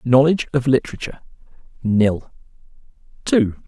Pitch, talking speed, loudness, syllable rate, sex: 125 Hz, 65 wpm, -19 LUFS, 5.8 syllables/s, male